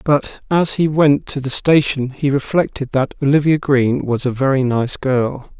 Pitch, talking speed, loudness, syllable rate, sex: 140 Hz, 180 wpm, -17 LUFS, 4.4 syllables/s, male